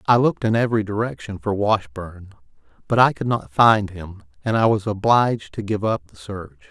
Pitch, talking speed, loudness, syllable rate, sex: 105 Hz, 195 wpm, -20 LUFS, 5.4 syllables/s, male